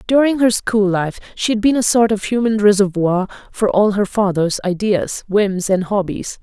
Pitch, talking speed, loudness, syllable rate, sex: 205 Hz, 185 wpm, -16 LUFS, 4.6 syllables/s, female